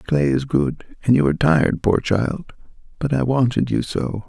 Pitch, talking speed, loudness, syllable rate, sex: 105 Hz, 195 wpm, -20 LUFS, 4.6 syllables/s, male